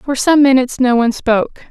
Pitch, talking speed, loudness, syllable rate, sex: 260 Hz, 210 wpm, -13 LUFS, 6.0 syllables/s, female